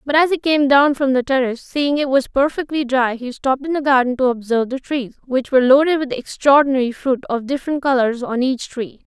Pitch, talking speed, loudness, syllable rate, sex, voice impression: 265 Hz, 225 wpm, -17 LUFS, 5.8 syllables/s, female, gender-neutral, young, weak, slightly bright, slightly halting, slightly cute, slightly modest, light